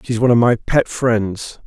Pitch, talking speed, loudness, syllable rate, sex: 115 Hz, 215 wpm, -16 LUFS, 4.6 syllables/s, male